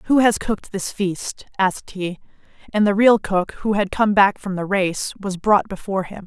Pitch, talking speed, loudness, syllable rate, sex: 195 Hz, 210 wpm, -20 LUFS, 4.8 syllables/s, female